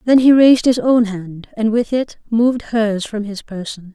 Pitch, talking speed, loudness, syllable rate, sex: 220 Hz, 215 wpm, -15 LUFS, 4.6 syllables/s, female